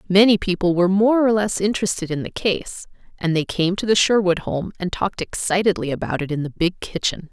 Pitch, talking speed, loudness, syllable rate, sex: 185 Hz, 215 wpm, -20 LUFS, 5.8 syllables/s, female